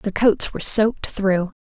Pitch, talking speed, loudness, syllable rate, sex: 205 Hz, 185 wpm, -18 LUFS, 4.6 syllables/s, female